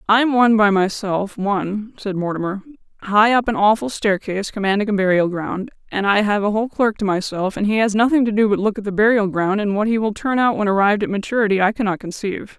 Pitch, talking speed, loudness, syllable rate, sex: 205 Hz, 240 wpm, -18 LUFS, 6.2 syllables/s, female